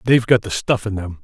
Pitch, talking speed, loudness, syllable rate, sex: 105 Hz, 290 wpm, -18 LUFS, 6.6 syllables/s, male